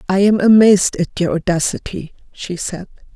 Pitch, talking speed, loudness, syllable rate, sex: 190 Hz, 150 wpm, -15 LUFS, 5.1 syllables/s, female